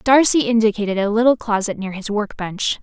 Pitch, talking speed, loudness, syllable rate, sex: 215 Hz, 190 wpm, -18 LUFS, 5.4 syllables/s, female